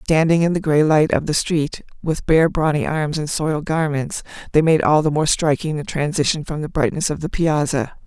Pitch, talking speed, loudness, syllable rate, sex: 155 Hz, 215 wpm, -19 LUFS, 5.1 syllables/s, female